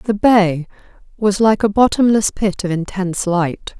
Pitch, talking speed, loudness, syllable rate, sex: 200 Hz, 160 wpm, -16 LUFS, 4.3 syllables/s, female